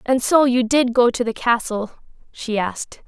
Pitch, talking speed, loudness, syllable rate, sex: 240 Hz, 195 wpm, -19 LUFS, 4.7 syllables/s, female